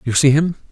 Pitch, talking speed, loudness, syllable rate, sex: 145 Hz, 250 wpm, -15 LUFS, 6.0 syllables/s, male